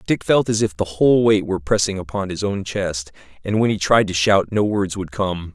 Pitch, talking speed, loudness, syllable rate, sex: 100 Hz, 250 wpm, -19 LUFS, 5.3 syllables/s, male